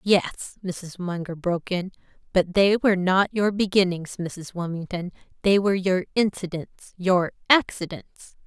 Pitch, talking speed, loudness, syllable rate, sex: 185 Hz, 130 wpm, -24 LUFS, 4.7 syllables/s, female